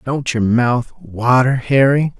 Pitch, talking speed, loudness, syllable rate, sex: 125 Hz, 135 wpm, -15 LUFS, 3.5 syllables/s, male